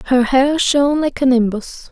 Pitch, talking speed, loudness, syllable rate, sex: 265 Hz, 190 wpm, -15 LUFS, 4.7 syllables/s, female